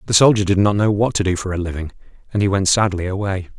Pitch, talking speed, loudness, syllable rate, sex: 100 Hz, 270 wpm, -18 LUFS, 6.7 syllables/s, male